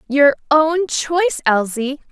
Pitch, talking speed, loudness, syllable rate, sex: 290 Hz, 115 wpm, -16 LUFS, 3.7 syllables/s, female